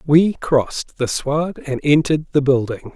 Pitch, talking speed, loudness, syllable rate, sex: 150 Hz, 165 wpm, -18 LUFS, 4.5 syllables/s, male